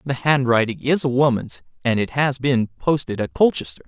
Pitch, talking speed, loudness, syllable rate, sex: 130 Hz, 185 wpm, -20 LUFS, 5.1 syllables/s, male